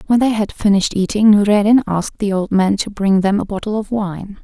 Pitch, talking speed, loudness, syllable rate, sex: 205 Hz, 230 wpm, -16 LUFS, 5.7 syllables/s, female